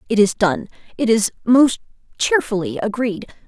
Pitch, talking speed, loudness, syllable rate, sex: 220 Hz, 120 wpm, -18 LUFS, 4.9 syllables/s, female